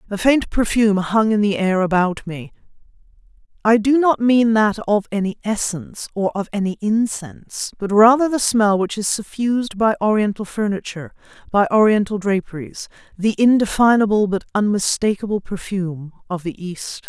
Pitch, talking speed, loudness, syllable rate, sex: 210 Hz, 150 wpm, -18 LUFS, 5.1 syllables/s, female